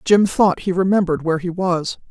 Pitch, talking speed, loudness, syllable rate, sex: 180 Hz, 200 wpm, -18 LUFS, 5.7 syllables/s, female